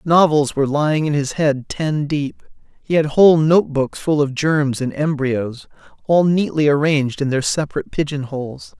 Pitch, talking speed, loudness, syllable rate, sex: 145 Hz, 175 wpm, -18 LUFS, 4.9 syllables/s, male